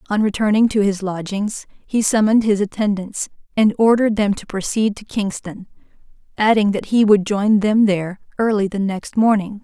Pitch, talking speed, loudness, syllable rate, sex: 205 Hz, 170 wpm, -18 LUFS, 5.1 syllables/s, female